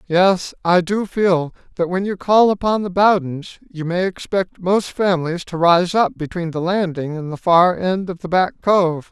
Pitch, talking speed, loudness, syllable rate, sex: 180 Hz, 195 wpm, -18 LUFS, 4.3 syllables/s, male